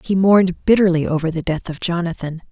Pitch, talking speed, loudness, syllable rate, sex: 175 Hz, 190 wpm, -18 LUFS, 6.0 syllables/s, female